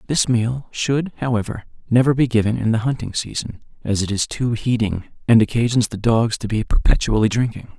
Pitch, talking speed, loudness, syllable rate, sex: 115 Hz, 185 wpm, -20 LUFS, 5.5 syllables/s, male